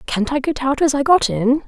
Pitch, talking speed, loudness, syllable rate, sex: 275 Hz, 285 wpm, -17 LUFS, 5.3 syllables/s, female